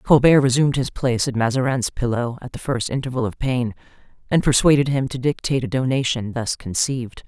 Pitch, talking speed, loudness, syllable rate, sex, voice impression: 125 Hz, 180 wpm, -20 LUFS, 5.9 syllables/s, female, feminine, slightly young, adult-like, tensed, powerful, slightly bright, clear, very fluent, slightly cool, slightly intellectual, slightly sincere, calm, slightly elegant, very lively, slightly strict, slightly sharp